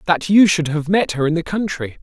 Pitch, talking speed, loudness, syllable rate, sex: 170 Hz, 265 wpm, -17 LUFS, 5.4 syllables/s, male